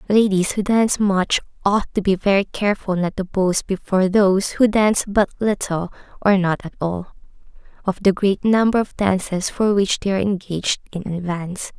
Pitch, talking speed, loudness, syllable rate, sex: 195 Hz, 180 wpm, -19 LUFS, 5.2 syllables/s, female